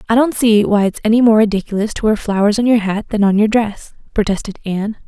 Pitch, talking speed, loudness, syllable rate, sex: 215 Hz, 235 wpm, -15 LUFS, 6.2 syllables/s, female